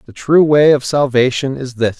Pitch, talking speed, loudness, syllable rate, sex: 135 Hz, 210 wpm, -13 LUFS, 4.9 syllables/s, male